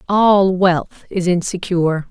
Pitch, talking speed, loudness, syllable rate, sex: 180 Hz, 115 wpm, -16 LUFS, 3.7 syllables/s, female